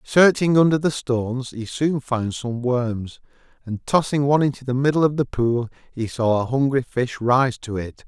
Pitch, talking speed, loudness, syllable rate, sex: 130 Hz, 195 wpm, -21 LUFS, 4.7 syllables/s, male